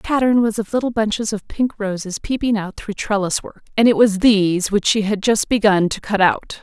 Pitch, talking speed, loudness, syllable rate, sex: 210 Hz, 235 wpm, -18 LUFS, 5.3 syllables/s, female